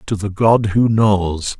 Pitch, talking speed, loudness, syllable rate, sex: 100 Hz, 190 wpm, -16 LUFS, 3.4 syllables/s, male